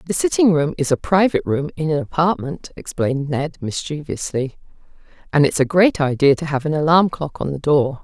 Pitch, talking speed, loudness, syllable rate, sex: 155 Hz, 195 wpm, -19 LUFS, 5.5 syllables/s, female